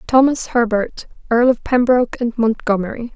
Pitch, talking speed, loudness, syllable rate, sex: 235 Hz, 135 wpm, -17 LUFS, 5.0 syllables/s, female